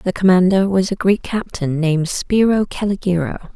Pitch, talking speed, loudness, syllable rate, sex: 185 Hz, 150 wpm, -17 LUFS, 5.1 syllables/s, female